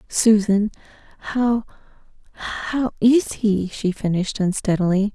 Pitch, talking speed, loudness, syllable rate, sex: 210 Hz, 80 wpm, -20 LUFS, 4.8 syllables/s, female